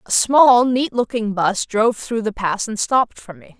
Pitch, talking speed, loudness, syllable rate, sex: 220 Hz, 215 wpm, -17 LUFS, 4.6 syllables/s, female